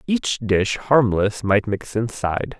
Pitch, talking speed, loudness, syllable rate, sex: 115 Hz, 140 wpm, -20 LUFS, 3.7 syllables/s, male